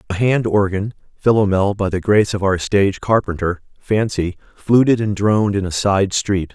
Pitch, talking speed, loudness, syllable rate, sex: 100 Hz, 155 wpm, -17 LUFS, 5.0 syllables/s, male